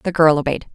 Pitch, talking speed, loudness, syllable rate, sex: 155 Hz, 240 wpm, -17 LUFS, 6.5 syllables/s, female